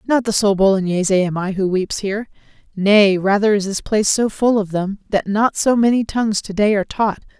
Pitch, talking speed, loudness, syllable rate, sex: 205 Hz, 220 wpm, -17 LUFS, 5.5 syllables/s, female